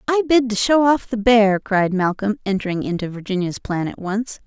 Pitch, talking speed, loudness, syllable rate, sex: 215 Hz, 200 wpm, -19 LUFS, 5.1 syllables/s, female